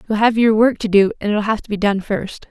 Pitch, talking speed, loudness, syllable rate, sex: 210 Hz, 310 wpm, -17 LUFS, 5.9 syllables/s, female